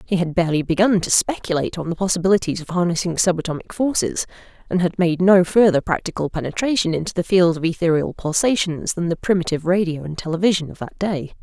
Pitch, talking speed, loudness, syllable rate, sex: 175 Hz, 190 wpm, -19 LUFS, 6.4 syllables/s, female